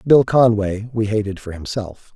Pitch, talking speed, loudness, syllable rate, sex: 110 Hz, 165 wpm, -19 LUFS, 4.5 syllables/s, male